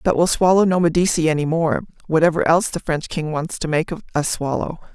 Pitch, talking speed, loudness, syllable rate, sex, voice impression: 165 Hz, 205 wpm, -19 LUFS, 5.9 syllables/s, female, feminine, adult-like, slightly relaxed, slightly soft, fluent, raspy, intellectual, calm, reassuring, slightly sharp, slightly modest